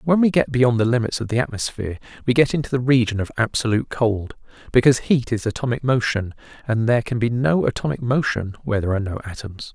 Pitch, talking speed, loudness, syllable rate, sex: 120 Hz, 210 wpm, -20 LUFS, 6.5 syllables/s, male